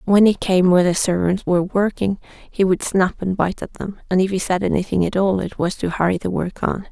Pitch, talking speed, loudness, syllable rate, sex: 185 Hz, 250 wpm, -19 LUFS, 5.6 syllables/s, female